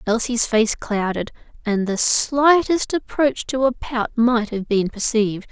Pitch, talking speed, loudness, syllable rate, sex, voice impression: 235 Hz, 150 wpm, -19 LUFS, 4.1 syllables/s, female, very feminine, young, slightly adult-like, very thin, slightly tensed, slightly weak, slightly bright, soft, clear, slightly fluent, very cute, intellectual, refreshing, very sincere, slightly calm, very friendly, very reassuring, very unique, elegant, very sweet, kind, intense, slightly sharp